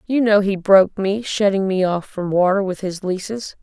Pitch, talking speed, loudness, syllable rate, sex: 195 Hz, 215 wpm, -18 LUFS, 4.9 syllables/s, female